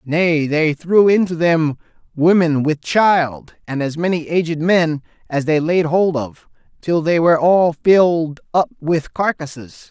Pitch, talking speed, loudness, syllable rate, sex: 165 Hz, 160 wpm, -16 LUFS, 3.9 syllables/s, male